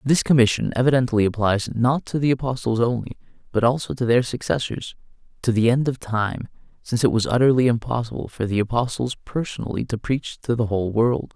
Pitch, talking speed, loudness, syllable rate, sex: 120 Hz, 180 wpm, -22 LUFS, 5.7 syllables/s, male